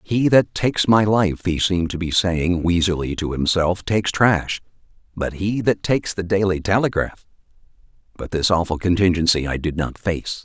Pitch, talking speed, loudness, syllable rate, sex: 90 Hz, 170 wpm, -20 LUFS, 5.1 syllables/s, male